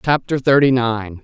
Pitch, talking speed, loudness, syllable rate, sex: 125 Hz, 145 wpm, -16 LUFS, 4.4 syllables/s, male